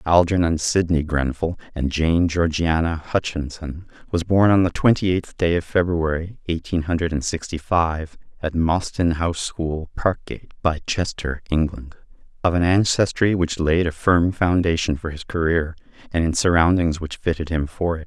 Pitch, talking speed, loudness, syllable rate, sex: 85 Hz, 160 wpm, -21 LUFS, 4.7 syllables/s, male